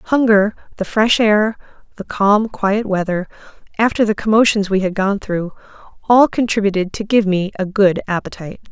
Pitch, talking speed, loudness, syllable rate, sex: 205 Hz, 160 wpm, -16 LUFS, 5.0 syllables/s, female